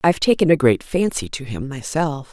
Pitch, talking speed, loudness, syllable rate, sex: 155 Hz, 205 wpm, -19 LUFS, 5.4 syllables/s, female